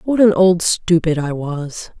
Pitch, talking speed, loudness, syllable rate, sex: 170 Hz, 180 wpm, -16 LUFS, 3.8 syllables/s, female